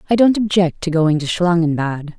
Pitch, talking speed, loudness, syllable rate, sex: 175 Hz, 190 wpm, -17 LUFS, 5.0 syllables/s, female